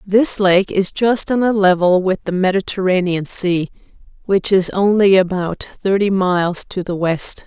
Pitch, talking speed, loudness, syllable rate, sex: 190 Hz, 160 wpm, -16 LUFS, 4.3 syllables/s, female